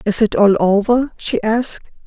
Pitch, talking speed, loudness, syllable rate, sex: 215 Hz, 175 wpm, -15 LUFS, 4.5 syllables/s, female